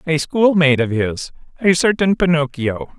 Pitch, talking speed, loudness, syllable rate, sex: 155 Hz, 140 wpm, -16 LUFS, 4.7 syllables/s, male